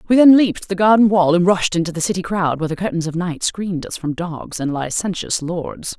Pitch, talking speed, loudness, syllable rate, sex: 175 Hz, 240 wpm, -18 LUFS, 5.7 syllables/s, female